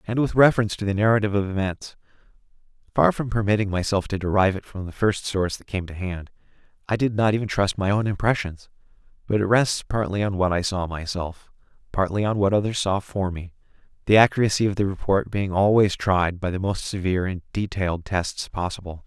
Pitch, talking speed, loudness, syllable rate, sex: 100 Hz, 200 wpm, -23 LUFS, 6.0 syllables/s, male